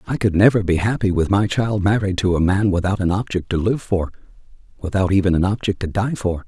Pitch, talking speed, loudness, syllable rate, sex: 95 Hz, 220 wpm, -19 LUFS, 5.9 syllables/s, male